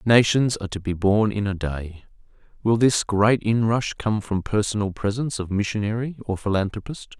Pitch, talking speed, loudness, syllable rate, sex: 105 Hz, 165 wpm, -23 LUFS, 5.1 syllables/s, male